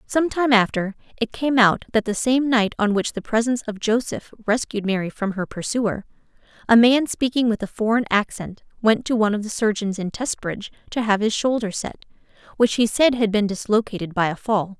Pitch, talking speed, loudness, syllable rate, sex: 220 Hz, 205 wpm, -21 LUFS, 5.4 syllables/s, female